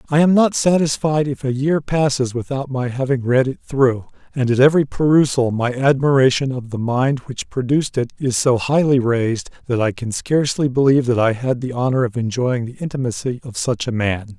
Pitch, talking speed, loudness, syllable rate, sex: 130 Hz, 200 wpm, -18 LUFS, 5.4 syllables/s, male